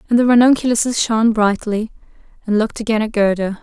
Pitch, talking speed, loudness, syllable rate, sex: 220 Hz, 165 wpm, -16 LUFS, 6.2 syllables/s, female